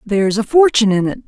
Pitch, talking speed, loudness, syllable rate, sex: 225 Hz, 235 wpm, -14 LUFS, 6.9 syllables/s, female